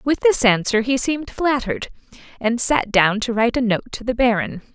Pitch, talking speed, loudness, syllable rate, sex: 240 Hz, 200 wpm, -19 LUFS, 5.5 syllables/s, female